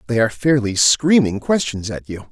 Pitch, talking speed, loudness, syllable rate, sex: 125 Hz, 180 wpm, -17 LUFS, 5.2 syllables/s, male